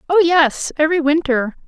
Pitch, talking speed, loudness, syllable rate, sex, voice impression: 305 Hz, 145 wpm, -16 LUFS, 5.3 syllables/s, female, very feminine, young, slightly adult-like, very thin, slightly tensed, slightly powerful, very bright, soft, very clear, very fluent, very cute, intellectual, very refreshing, sincere, calm, very friendly, very reassuring, unique, very elegant, sweet, lively, very kind, slightly sharp, slightly modest, light